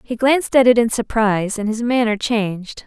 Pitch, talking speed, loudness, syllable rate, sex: 225 Hz, 210 wpm, -17 LUFS, 5.4 syllables/s, female